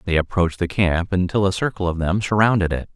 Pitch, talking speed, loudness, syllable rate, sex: 90 Hz, 225 wpm, -20 LUFS, 6.1 syllables/s, male